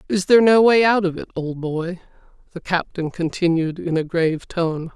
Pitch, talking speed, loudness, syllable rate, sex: 175 Hz, 195 wpm, -19 LUFS, 5.2 syllables/s, female